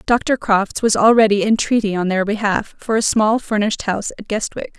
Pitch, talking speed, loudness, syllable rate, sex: 210 Hz, 200 wpm, -17 LUFS, 5.3 syllables/s, female